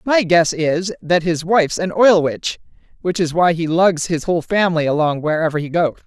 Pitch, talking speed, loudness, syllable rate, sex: 170 Hz, 210 wpm, -17 LUFS, 5.2 syllables/s, female